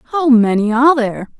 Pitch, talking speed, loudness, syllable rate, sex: 250 Hz, 170 wpm, -13 LUFS, 6.5 syllables/s, female